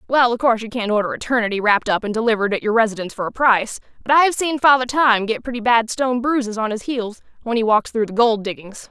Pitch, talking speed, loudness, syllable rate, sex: 230 Hz, 250 wpm, -18 LUFS, 6.9 syllables/s, female